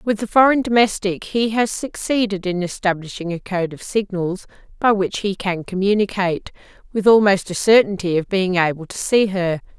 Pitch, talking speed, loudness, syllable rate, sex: 195 Hz, 165 wpm, -19 LUFS, 5.1 syllables/s, female